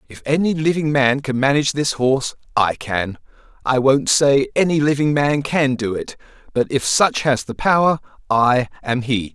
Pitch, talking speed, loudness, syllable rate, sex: 135 Hz, 175 wpm, -18 LUFS, 4.7 syllables/s, male